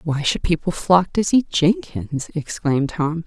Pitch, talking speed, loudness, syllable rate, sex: 170 Hz, 165 wpm, -20 LUFS, 4.2 syllables/s, female